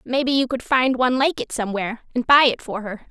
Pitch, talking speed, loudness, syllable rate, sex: 245 Hz, 250 wpm, -20 LUFS, 6.4 syllables/s, female